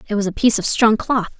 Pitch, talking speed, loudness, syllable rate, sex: 220 Hz, 300 wpm, -17 LUFS, 7.1 syllables/s, female